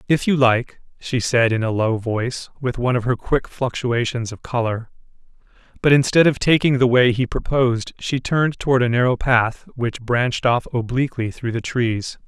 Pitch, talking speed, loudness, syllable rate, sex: 125 Hz, 185 wpm, -19 LUFS, 5.0 syllables/s, male